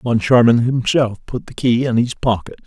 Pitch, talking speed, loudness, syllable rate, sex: 120 Hz, 180 wpm, -16 LUFS, 5.0 syllables/s, male